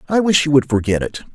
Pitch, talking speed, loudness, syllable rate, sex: 145 Hz, 265 wpm, -16 LUFS, 6.4 syllables/s, male